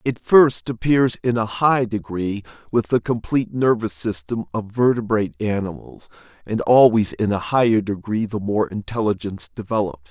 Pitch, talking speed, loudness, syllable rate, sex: 110 Hz, 150 wpm, -20 LUFS, 4.9 syllables/s, male